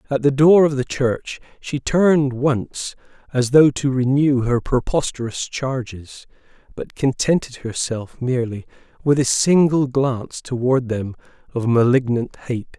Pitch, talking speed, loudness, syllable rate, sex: 130 Hz, 135 wpm, -19 LUFS, 4.2 syllables/s, male